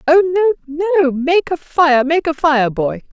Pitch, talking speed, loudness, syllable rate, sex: 305 Hz, 190 wpm, -15 LUFS, 3.8 syllables/s, female